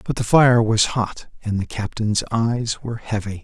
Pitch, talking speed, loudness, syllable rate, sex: 110 Hz, 190 wpm, -20 LUFS, 4.5 syllables/s, male